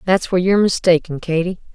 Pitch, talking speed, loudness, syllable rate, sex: 180 Hz, 170 wpm, -17 LUFS, 6.7 syllables/s, female